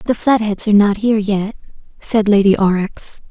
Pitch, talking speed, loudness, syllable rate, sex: 210 Hz, 165 wpm, -15 LUFS, 5.1 syllables/s, female